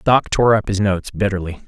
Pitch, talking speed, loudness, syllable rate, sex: 100 Hz, 215 wpm, -18 LUFS, 5.9 syllables/s, male